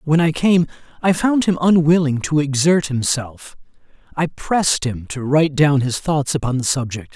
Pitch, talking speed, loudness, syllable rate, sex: 150 Hz, 175 wpm, -18 LUFS, 4.8 syllables/s, male